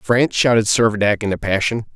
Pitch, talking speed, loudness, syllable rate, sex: 105 Hz, 185 wpm, -17 LUFS, 5.9 syllables/s, male